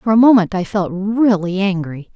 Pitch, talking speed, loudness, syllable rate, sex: 195 Hz, 195 wpm, -15 LUFS, 4.8 syllables/s, female